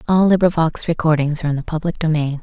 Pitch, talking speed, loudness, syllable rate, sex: 160 Hz, 200 wpm, -18 LUFS, 6.8 syllables/s, female